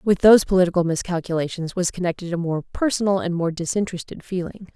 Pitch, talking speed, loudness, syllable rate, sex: 180 Hz, 165 wpm, -21 LUFS, 6.5 syllables/s, female